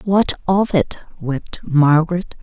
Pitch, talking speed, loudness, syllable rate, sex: 170 Hz, 125 wpm, -17 LUFS, 3.5 syllables/s, female